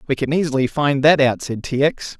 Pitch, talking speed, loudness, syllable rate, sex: 140 Hz, 245 wpm, -18 LUFS, 5.5 syllables/s, male